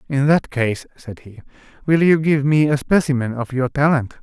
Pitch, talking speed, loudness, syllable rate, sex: 140 Hz, 200 wpm, -17 LUFS, 4.9 syllables/s, male